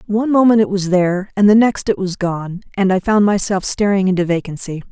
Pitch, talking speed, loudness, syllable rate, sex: 195 Hz, 220 wpm, -16 LUFS, 5.8 syllables/s, female